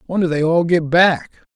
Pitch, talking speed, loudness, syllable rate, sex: 165 Hz, 195 wpm, -16 LUFS, 5.0 syllables/s, male